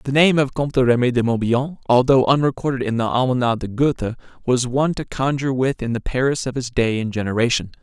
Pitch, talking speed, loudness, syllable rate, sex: 125 Hz, 205 wpm, -19 LUFS, 6.6 syllables/s, male